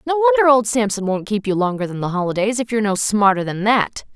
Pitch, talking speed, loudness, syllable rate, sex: 215 Hz, 245 wpm, -18 LUFS, 6.5 syllables/s, female